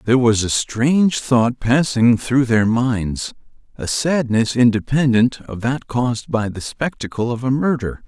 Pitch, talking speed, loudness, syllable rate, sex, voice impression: 120 Hz, 155 wpm, -18 LUFS, 4.3 syllables/s, male, very masculine, very middle-aged, thick, tensed, slightly powerful, bright, soft, clear, fluent, very cool, intellectual, refreshing, sincere, calm, friendly, very reassuring, unique, elegant, wild, slightly sweet, very lively, kind, intense